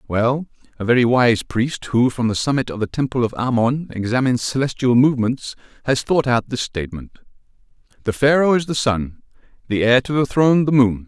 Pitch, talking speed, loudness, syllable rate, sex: 125 Hz, 185 wpm, -18 LUFS, 5.4 syllables/s, male